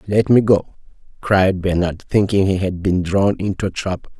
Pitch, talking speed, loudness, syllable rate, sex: 95 Hz, 185 wpm, -18 LUFS, 4.7 syllables/s, male